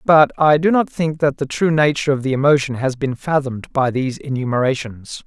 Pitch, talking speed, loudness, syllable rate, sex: 140 Hz, 205 wpm, -18 LUFS, 5.7 syllables/s, male